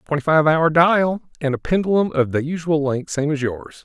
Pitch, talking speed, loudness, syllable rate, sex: 155 Hz, 220 wpm, -19 LUFS, 5.1 syllables/s, male